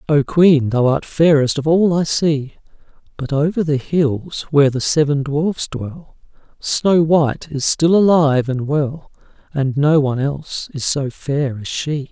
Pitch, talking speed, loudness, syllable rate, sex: 145 Hz, 170 wpm, -17 LUFS, 4.2 syllables/s, male